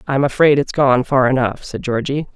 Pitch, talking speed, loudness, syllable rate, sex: 135 Hz, 205 wpm, -16 LUFS, 5.1 syllables/s, female